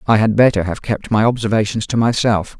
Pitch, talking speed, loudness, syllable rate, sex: 110 Hz, 210 wpm, -16 LUFS, 5.8 syllables/s, male